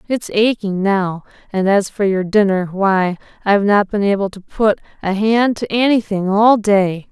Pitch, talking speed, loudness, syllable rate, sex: 200 Hz, 175 wpm, -16 LUFS, 4.4 syllables/s, female